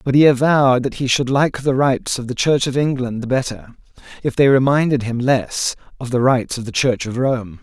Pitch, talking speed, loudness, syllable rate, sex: 130 Hz, 220 wpm, -17 LUFS, 5.4 syllables/s, male